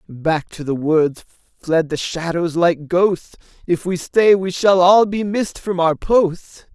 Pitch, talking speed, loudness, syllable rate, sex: 175 Hz, 180 wpm, -17 LUFS, 3.8 syllables/s, male